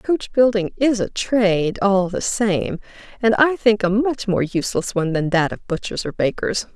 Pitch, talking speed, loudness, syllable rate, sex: 205 Hz, 195 wpm, -19 LUFS, 4.7 syllables/s, female